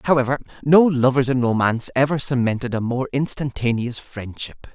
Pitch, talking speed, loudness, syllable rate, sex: 130 Hz, 140 wpm, -20 LUFS, 5.5 syllables/s, male